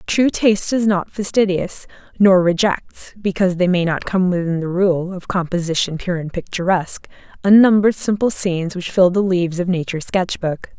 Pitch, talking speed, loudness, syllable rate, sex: 185 Hz, 170 wpm, -18 LUFS, 5.3 syllables/s, female